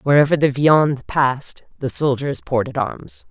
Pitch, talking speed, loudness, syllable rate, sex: 140 Hz, 145 wpm, -18 LUFS, 4.8 syllables/s, female